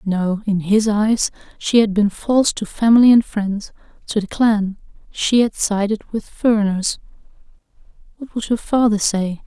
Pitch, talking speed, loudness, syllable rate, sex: 210 Hz, 145 wpm, -18 LUFS, 4.4 syllables/s, female